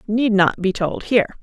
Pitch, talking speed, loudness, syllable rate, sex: 205 Hz, 210 wpm, -18 LUFS, 5.3 syllables/s, female